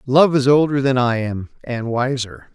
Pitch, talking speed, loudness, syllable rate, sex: 130 Hz, 190 wpm, -18 LUFS, 4.4 syllables/s, male